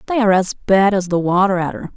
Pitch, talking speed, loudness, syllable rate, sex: 195 Hz, 245 wpm, -16 LUFS, 6.6 syllables/s, female